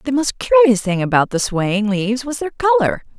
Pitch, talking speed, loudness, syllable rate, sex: 245 Hz, 225 wpm, -17 LUFS, 5.4 syllables/s, female